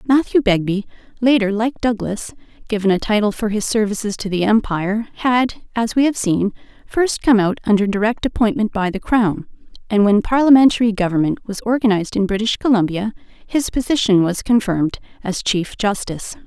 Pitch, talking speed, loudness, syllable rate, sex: 215 Hz, 160 wpm, -18 LUFS, 5.4 syllables/s, female